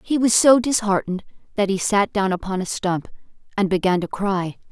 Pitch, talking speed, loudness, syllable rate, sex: 200 Hz, 190 wpm, -20 LUFS, 5.4 syllables/s, female